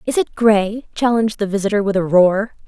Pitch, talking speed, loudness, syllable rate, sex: 210 Hz, 200 wpm, -17 LUFS, 5.5 syllables/s, female